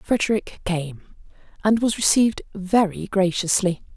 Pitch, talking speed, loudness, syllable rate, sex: 195 Hz, 105 wpm, -21 LUFS, 4.3 syllables/s, female